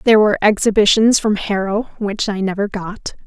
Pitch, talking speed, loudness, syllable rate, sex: 205 Hz, 145 wpm, -16 LUFS, 5.4 syllables/s, female